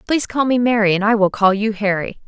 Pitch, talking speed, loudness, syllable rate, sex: 215 Hz, 265 wpm, -17 LUFS, 6.3 syllables/s, female